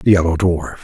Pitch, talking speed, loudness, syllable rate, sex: 85 Hz, 215 wpm, -16 LUFS, 6.0 syllables/s, male